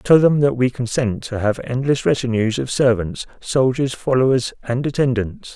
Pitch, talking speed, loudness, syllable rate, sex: 130 Hz, 160 wpm, -19 LUFS, 4.8 syllables/s, male